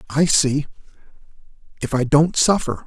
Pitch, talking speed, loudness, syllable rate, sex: 150 Hz, 105 wpm, -18 LUFS, 4.6 syllables/s, male